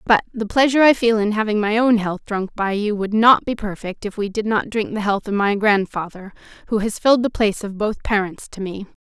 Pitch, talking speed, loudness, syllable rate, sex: 210 Hz, 245 wpm, -19 LUFS, 5.5 syllables/s, female